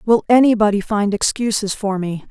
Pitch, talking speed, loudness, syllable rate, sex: 210 Hz, 155 wpm, -17 LUFS, 5.2 syllables/s, female